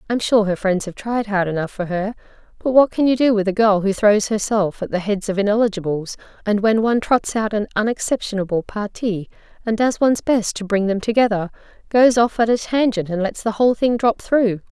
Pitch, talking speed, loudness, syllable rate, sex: 210 Hz, 220 wpm, -19 LUFS, 5.6 syllables/s, female